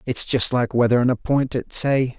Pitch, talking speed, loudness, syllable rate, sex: 125 Hz, 220 wpm, -19 LUFS, 4.9 syllables/s, male